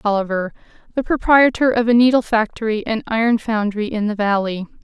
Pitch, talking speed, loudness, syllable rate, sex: 225 Hz, 160 wpm, -18 LUFS, 5.6 syllables/s, female